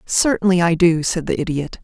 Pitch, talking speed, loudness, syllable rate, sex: 175 Hz, 195 wpm, -17 LUFS, 5.3 syllables/s, female